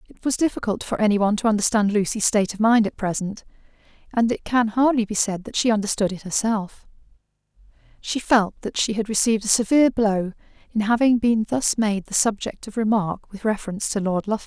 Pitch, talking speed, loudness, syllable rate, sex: 215 Hz, 200 wpm, -21 LUFS, 5.9 syllables/s, female